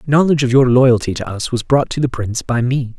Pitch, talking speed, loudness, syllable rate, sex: 125 Hz, 260 wpm, -15 LUFS, 6.0 syllables/s, male